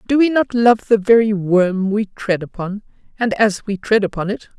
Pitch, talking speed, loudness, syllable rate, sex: 210 Hz, 210 wpm, -17 LUFS, 4.8 syllables/s, female